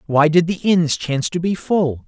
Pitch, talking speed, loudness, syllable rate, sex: 165 Hz, 230 wpm, -18 LUFS, 4.7 syllables/s, male